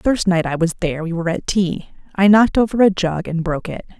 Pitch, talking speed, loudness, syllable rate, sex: 180 Hz, 270 wpm, -17 LUFS, 6.5 syllables/s, female